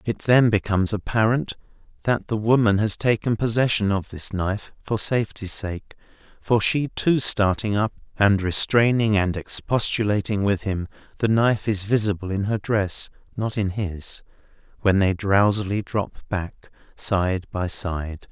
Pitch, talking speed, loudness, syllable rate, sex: 105 Hz, 145 wpm, -22 LUFS, 4.4 syllables/s, male